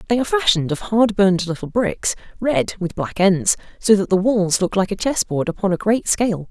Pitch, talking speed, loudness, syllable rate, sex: 200 Hz, 230 wpm, -19 LUFS, 5.5 syllables/s, female